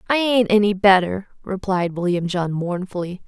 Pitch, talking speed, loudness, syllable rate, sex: 190 Hz, 145 wpm, -20 LUFS, 4.7 syllables/s, female